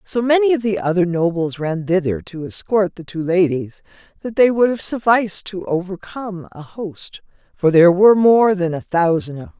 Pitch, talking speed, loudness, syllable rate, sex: 190 Hz, 195 wpm, -17 LUFS, 5.2 syllables/s, female